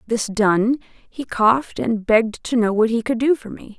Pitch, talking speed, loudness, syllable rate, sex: 230 Hz, 220 wpm, -19 LUFS, 4.5 syllables/s, female